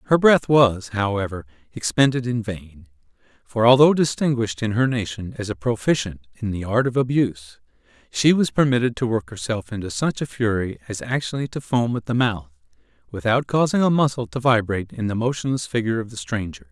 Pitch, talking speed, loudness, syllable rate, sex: 115 Hz, 185 wpm, -21 LUFS, 5.7 syllables/s, male